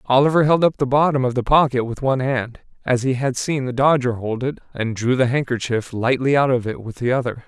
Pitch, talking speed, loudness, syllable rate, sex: 130 Hz, 240 wpm, -19 LUFS, 5.7 syllables/s, male